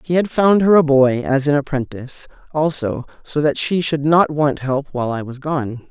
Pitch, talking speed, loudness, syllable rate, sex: 145 Hz, 215 wpm, -17 LUFS, 5.0 syllables/s, male